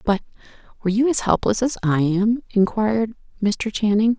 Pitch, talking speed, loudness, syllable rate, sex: 215 Hz, 160 wpm, -21 LUFS, 5.3 syllables/s, female